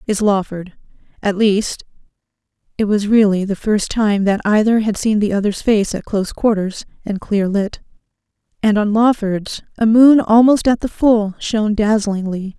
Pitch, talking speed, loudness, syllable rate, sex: 210 Hz, 155 wpm, -16 LUFS, 4.6 syllables/s, female